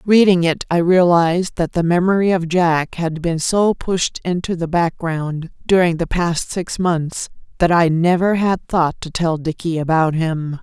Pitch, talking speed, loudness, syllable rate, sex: 170 Hz, 175 wpm, -17 LUFS, 4.2 syllables/s, female